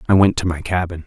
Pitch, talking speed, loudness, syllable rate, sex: 90 Hz, 280 wpm, -18 LUFS, 6.7 syllables/s, male